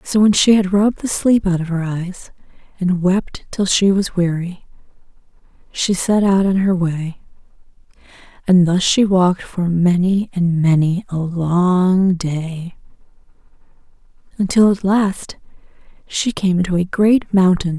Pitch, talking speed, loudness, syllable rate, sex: 185 Hz, 145 wpm, -16 LUFS, 4.0 syllables/s, female